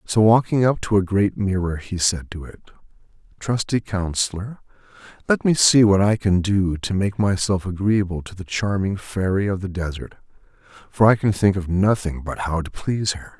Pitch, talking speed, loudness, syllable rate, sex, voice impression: 100 Hz, 190 wpm, -20 LUFS, 4.9 syllables/s, male, very masculine, old, relaxed, slightly weak, bright, very soft, very muffled, fluent, raspy, cool, very intellectual, slightly refreshing, very sincere, very calm, very mature, very friendly, very reassuring, very unique, elegant, very wild, very sweet, lively, very kind, modest